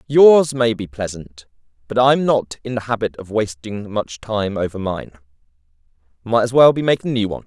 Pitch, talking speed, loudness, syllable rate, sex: 110 Hz, 185 wpm, -18 LUFS, 4.9 syllables/s, male